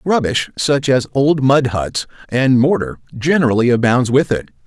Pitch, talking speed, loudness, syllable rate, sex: 130 Hz, 155 wpm, -15 LUFS, 4.5 syllables/s, male